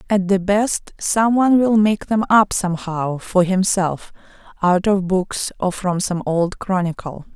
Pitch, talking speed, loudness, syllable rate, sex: 190 Hz, 155 wpm, -18 LUFS, 4.1 syllables/s, female